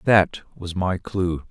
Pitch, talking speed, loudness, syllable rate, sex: 90 Hz, 160 wpm, -23 LUFS, 3.4 syllables/s, male